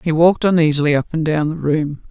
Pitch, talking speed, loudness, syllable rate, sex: 160 Hz, 230 wpm, -16 LUFS, 6.0 syllables/s, female